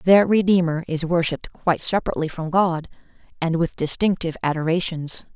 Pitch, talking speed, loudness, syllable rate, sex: 170 Hz, 135 wpm, -22 LUFS, 5.8 syllables/s, female